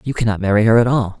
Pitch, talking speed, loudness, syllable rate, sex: 110 Hz, 300 wpm, -15 LUFS, 7.4 syllables/s, male